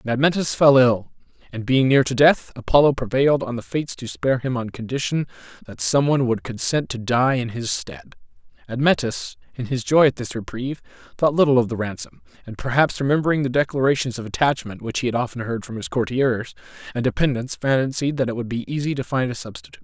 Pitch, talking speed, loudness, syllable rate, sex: 130 Hz, 205 wpm, -21 LUFS, 6.1 syllables/s, male